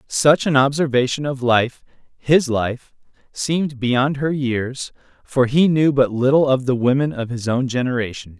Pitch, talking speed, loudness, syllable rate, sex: 130 Hz, 165 wpm, -18 LUFS, 4.4 syllables/s, male